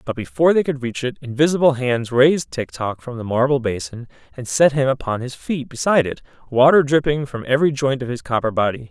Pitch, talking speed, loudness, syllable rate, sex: 130 Hz, 215 wpm, -19 LUFS, 5.9 syllables/s, male